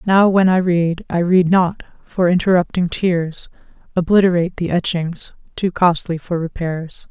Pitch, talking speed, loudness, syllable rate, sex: 175 Hz, 145 wpm, -17 LUFS, 4.4 syllables/s, female